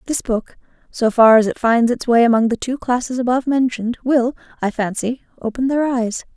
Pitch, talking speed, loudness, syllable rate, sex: 240 Hz, 200 wpm, -17 LUFS, 5.6 syllables/s, female